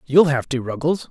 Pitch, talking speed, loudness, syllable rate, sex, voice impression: 145 Hz, 215 wpm, -20 LUFS, 5.0 syllables/s, male, masculine, slightly middle-aged, thick, very tensed, powerful, very bright, slightly hard, clear, very fluent, raspy, cool, intellectual, refreshing, slightly sincere, slightly calm, friendly, slightly reassuring, very unique, slightly elegant, very wild, sweet, very lively, slightly kind, intense